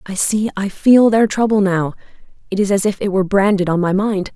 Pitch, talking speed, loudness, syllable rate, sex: 200 Hz, 220 wpm, -16 LUFS, 5.5 syllables/s, female